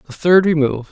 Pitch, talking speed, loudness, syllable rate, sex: 155 Hz, 195 wpm, -14 LUFS, 6.7 syllables/s, male